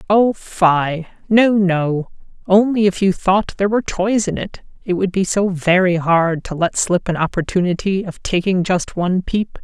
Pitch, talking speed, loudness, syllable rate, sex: 185 Hz, 180 wpm, -17 LUFS, 4.7 syllables/s, female